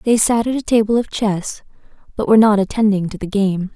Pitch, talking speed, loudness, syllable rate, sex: 210 Hz, 225 wpm, -16 LUFS, 5.8 syllables/s, female